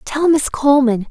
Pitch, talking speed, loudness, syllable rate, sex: 270 Hz, 165 wpm, -14 LUFS, 5.0 syllables/s, female